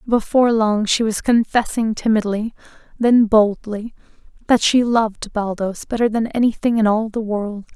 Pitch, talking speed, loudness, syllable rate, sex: 220 Hz, 145 wpm, -18 LUFS, 4.7 syllables/s, female